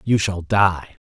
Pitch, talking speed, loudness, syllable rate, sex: 95 Hz, 170 wpm, -19 LUFS, 3.4 syllables/s, male